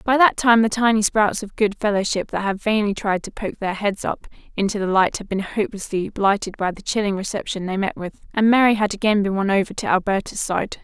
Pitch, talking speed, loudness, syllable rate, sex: 205 Hz, 235 wpm, -20 LUFS, 5.7 syllables/s, female